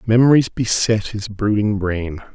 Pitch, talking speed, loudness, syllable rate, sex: 105 Hz, 130 wpm, -18 LUFS, 4.3 syllables/s, male